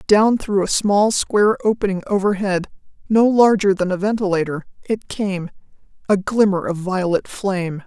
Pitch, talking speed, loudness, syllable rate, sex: 195 Hz, 145 wpm, -18 LUFS, 4.8 syllables/s, female